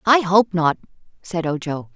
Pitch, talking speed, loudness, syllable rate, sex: 180 Hz, 155 wpm, -19 LUFS, 4.4 syllables/s, female